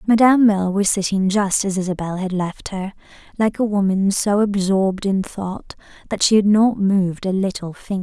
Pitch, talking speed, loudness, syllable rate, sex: 195 Hz, 185 wpm, -18 LUFS, 5.2 syllables/s, female